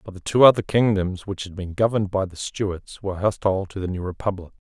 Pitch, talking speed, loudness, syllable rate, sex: 95 Hz, 230 wpm, -22 LUFS, 6.0 syllables/s, male